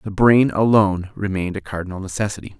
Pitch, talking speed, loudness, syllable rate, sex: 100 Hz, 160 wpm, -19 LUFS, 6.5 syllables/s, male